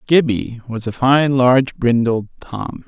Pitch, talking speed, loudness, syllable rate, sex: 125 Hz, 145 wpm, -17 LUFS, 3.9 syllables/s, male